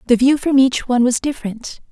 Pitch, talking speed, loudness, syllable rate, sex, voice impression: 255 Hz, 220 wpm, -16 LUFS, 6.0 syllables/s, female, very feminine, slightly adult-like, slightly cute, friendly, slightly reassuring, slightly kind